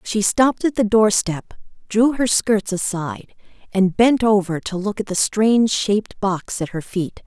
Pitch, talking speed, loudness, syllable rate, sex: 205 Hz, 180 wpm, -19 LUFS, 4.5 syllables/s, female